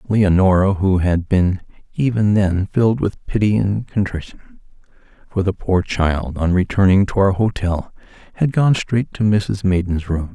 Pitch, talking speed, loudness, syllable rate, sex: 95 Hz, 155 wpm, -18 LUFS, 4.3 syllables/s, male